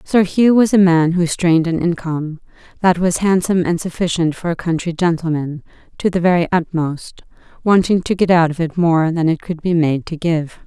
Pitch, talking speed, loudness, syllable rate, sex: 170 Hz, 205 wpm, -16 LUFS, 5.2 syllables/s, female